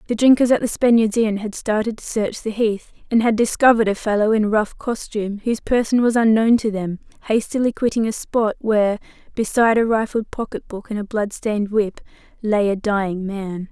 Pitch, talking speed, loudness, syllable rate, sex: 215 Hz, 195 wpm, -19 LUFS, 5.5 syllables/s, female